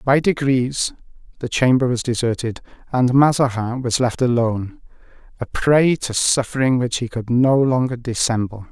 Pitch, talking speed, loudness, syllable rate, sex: 125 Hz, 145 wpm, -19 LUFS, 4.7 syllables/s, male